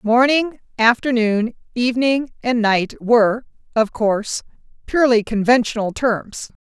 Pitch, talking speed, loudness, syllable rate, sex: 235 Hz, 100 wpm, -18 LUFS, 4.4 syllables/s, female